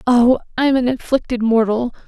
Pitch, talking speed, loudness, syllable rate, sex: 240 Hz, 175 wpm, -17 LUFS, 5.5 syllables/s, female